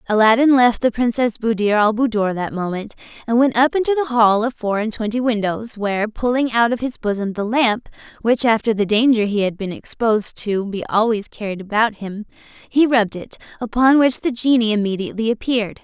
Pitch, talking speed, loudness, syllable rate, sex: 225 Hz, 195 wpm, -18 LUFS, 5.6 syllables/s, female